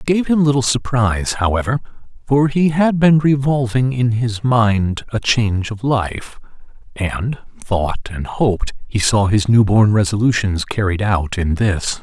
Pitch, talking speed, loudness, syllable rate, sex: 115 Hz, 160 wpm, -17 LUFS, 4.3 syllables/s, male